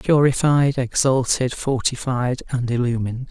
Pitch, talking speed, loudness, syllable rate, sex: 130 Hz, 90 wpm, -20 LUFS, 4.4 syllables/s, male